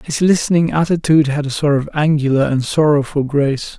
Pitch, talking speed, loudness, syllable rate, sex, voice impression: 150 Hz, 175 wpm, -15 LUFS, 5.7 syllables/s, male, masculine, slightly old, slightly thick, slightly muffled, slightly halting, calm, elegant, slightly sweet, slightly kind